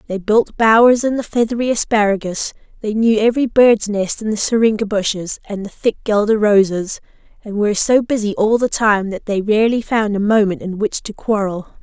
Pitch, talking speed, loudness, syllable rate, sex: 215 Hz, 195 wpm, -16 LUFS, 5.3 syllables/s, female